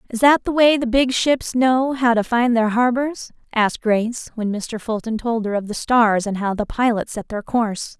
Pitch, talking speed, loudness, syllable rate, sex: 235 Hz, 225 wpm, -19 LUFS, 4.8 syllables/s, female